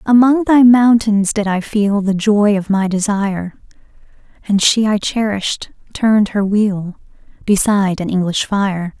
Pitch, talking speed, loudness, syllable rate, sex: 205 Hz, 145 wpm, -15 LUFS, 4.1 syllables/s, female